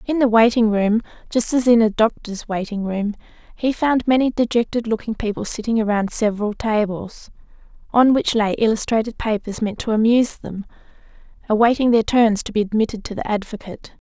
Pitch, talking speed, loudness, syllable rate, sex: 225 Hz, 165 wpm, -19 LUFS, 5.5 syllables/s, female